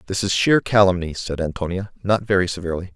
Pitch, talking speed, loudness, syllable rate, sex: 95 Hz, 185 wpm, -20 LUFS, 6.4 syllables/s, male